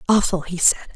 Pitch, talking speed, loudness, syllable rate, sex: 185 Hz, 190 wpm, -19 LUFS, 6.6 syllables/s, female